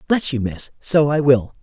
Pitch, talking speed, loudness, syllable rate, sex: 135 Hz, 220 wpm, -18 LUFS, 4.5 syllables/s, female